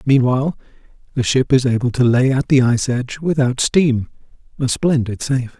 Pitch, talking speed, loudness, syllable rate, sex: 130 Hz, 170 wpm, -17 LUFS, 5.5 syllables/s, male